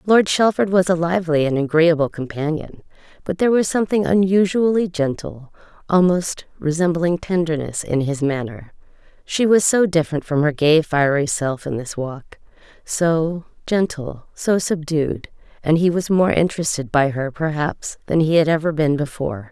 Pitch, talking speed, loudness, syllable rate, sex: 165 Hz, 150 wpm, -19 LUFS, 4.9 syllables/s, female